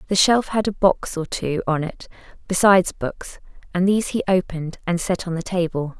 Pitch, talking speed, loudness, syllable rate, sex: 180 Hz, 200 wpm, -21 LUFS, 5.3 syllables/s, female